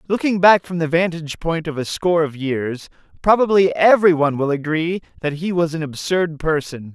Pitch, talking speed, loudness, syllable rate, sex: 165 Hz, 190 wpm, -18 LUFS, 5.4 syllables/s, male